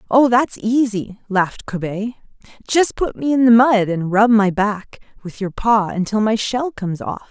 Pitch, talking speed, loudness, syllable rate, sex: 215 Hz, 190 wpm, -17 LUFS, 4.5 syllables/s, female